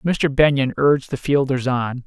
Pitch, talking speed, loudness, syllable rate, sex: 135 Hz, 175 wpm, -19 LUFS, 4.5 syllables/s, male